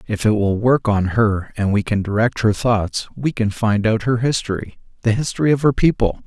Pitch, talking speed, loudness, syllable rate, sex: 110 Hz, 220 wpm, -18 LUFS, 5.1 syllables/s, male